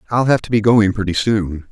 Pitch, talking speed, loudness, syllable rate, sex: 105 Hz, 245 wpm, -16 LUFS, 5.4 syllables/s, male